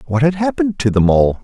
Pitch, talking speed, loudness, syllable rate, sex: 135 Hz, 250 wpm, -15 LUFS, 6.5 syllables/s, male